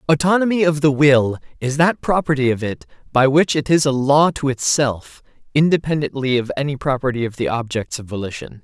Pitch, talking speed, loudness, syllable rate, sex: 140 Hz, 180 wpm, -18 LUFS, 3.4 syllables/s, male